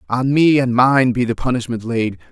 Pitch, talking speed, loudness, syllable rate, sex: 125 Hz, 210 wpm, -16 LUFS, 4.9 syllables/s, male